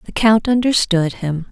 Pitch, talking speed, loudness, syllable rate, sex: 200 Hz, 160 wpm, -16 LUFS, 4.4 syllables/s, female